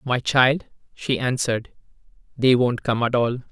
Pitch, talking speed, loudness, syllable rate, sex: 125 Hz, 155 wpm, -21 LUFS, 4.6 syllables/s, male